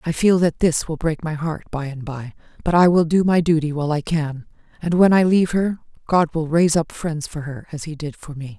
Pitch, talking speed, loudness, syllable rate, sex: 160 Hz, 260 wpm, -20 LUFS, 5.5 syllables/s, female